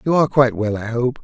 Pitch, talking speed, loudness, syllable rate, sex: 125 Hz, 290 wpm, -18 LUFS, 7.3 syllables/s, male